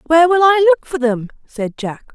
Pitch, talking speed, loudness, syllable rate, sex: 300 Hz, 225 wpm, -15 LUFS, 5.9 syllables/s, female